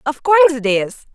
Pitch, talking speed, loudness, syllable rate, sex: 275 Hz, 210 wpm, -14 LUFS, 5.6 syllables/s, female